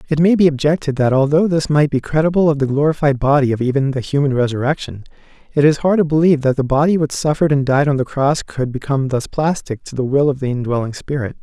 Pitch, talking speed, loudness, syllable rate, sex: 140 Hz, 235 wpm, -16 LUFS, 6.4 syllables/s, male